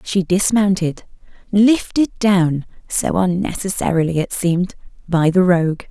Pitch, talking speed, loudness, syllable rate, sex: 185 Hz, 100 wpm, -17 LUFS, 3.0 syllables/s, female